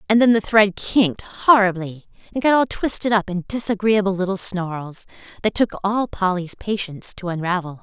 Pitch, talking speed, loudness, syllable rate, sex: 200 Hz, 170 wpm, -20 LUFS, 5.0 syllables/s, female